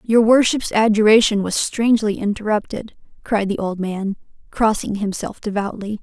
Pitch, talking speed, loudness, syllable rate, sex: 210 Hz, 130 wpm, -18 LUFS, 4.9 syllables/s, female